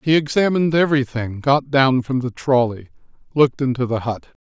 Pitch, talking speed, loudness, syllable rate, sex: 130 Hz, 160 wpm, -19 LUFS, 5.6 syllables/s, male